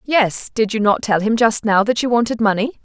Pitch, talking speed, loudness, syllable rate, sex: 225 Hz, 255 wpm, -17 LUFS, 5.2 syllables/s, female